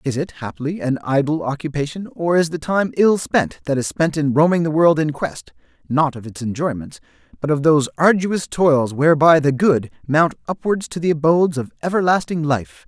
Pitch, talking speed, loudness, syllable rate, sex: 150 Hz, 190 wpm, -18 LUFS, 5.2 syllables/s, male